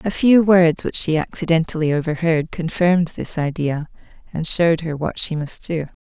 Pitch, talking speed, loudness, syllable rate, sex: 165 Hz, 170 wpm, -19 LUFS, 5.0 syllables/s, female